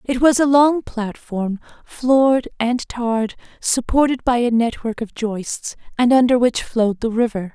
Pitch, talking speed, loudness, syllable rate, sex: 240 Hz, 160 wpm, -18 LUFS, 4.4 syllables/s, female